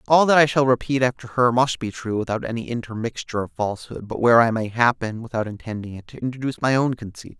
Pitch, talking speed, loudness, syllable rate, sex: 120 Hz, 225 wpm, -21 LUFS, 6.6 syllables/s, male